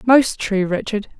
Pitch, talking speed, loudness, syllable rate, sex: 215 Hz, 150 wpm, -19 LUFS, 4.0 syllables/s, female